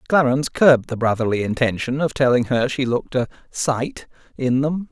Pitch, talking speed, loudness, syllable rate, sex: 130 Hz, 170 wpm, -20 LUFS, 5.5 syllables/s, male